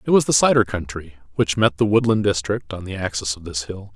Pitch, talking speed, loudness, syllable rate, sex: 100 Hz, 245 wpm, -20 LUFS, 5.8 syllables/s, male